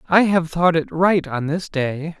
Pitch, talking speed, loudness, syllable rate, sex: 165 Hz, 220 wpm, -19 LUFS, 4.0 syllables/s, male